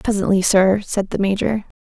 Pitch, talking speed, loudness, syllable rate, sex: 200 Hz, 165 wpm, -18 LUFS, 5.1 syllables/s, female